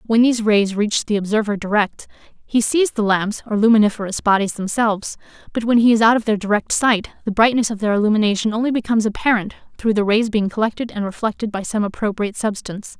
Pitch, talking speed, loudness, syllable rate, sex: 215 Hz, 200 wpm, -18 LUFS, 6.2 syllables/s, female